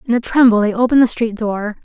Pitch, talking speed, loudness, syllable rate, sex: 230 Hz, 260 wpm, -14 LUFS, 6.7 syllables/s, female